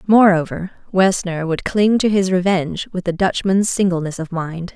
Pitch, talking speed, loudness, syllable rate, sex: 185 Hz, 165 wpm, -18 LUFS, 4.8 syllables/s, female